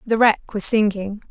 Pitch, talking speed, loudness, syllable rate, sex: 210 Hz, 185 wpm, -18 LUFS, 4.4 syllables/s, female